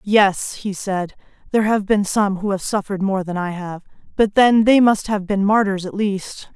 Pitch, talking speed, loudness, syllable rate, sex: 200 Hz, 210 wpm, -18 LUFS, 4.7 syllables/s, female